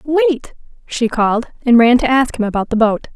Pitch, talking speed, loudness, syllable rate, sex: 245 Hz, 210 wpm, -15 LUFS, 5.1 syllables/s, female